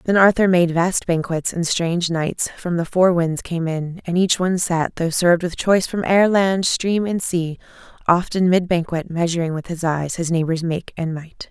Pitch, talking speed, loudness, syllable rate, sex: 175 Hz, 215 wpm, -19 LUFS, 4.8 syllables/s, female